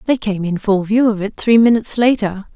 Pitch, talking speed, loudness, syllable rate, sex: 210 Hz, 235 wpm, -15 LUFS, 5.5 syllables/s, female